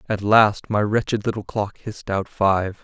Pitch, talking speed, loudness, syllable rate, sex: 105 Hz, 190 wpm, -21 LUFS, 4.6 syllables/s, male